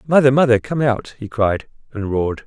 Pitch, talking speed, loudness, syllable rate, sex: 120 Hz, 195 wpm, -18 LUFS, 5.3 syllables/s, male